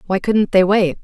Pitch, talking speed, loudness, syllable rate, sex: 195 Hz, 235 wpm, -15 LUFS, 4.7 syllables/s, female